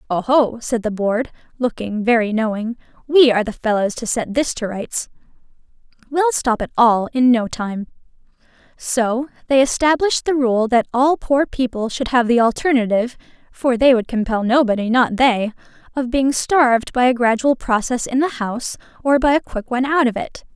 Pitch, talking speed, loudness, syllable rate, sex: 245 Hz, 180 wpm, -18 LUFS, 4.7 syllables/s, female